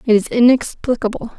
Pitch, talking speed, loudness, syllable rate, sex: 235 Hz, 130 wpm, -16 LUFS, 5.5 syllables/s, female